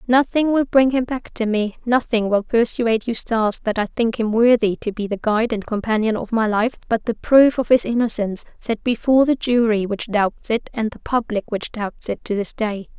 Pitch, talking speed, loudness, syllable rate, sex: 225 Hz, 210 wpm, -19 LUFS, 5.2 syllables/s, female